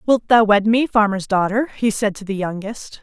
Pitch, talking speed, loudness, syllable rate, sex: 215 Hz, 220 wpm, -18 LUFS, 5.0 syllables/s, female